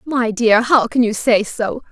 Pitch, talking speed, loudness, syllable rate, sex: 235 Hz, 220 wpm, -16 LUFS, 4.0 syllables/s, female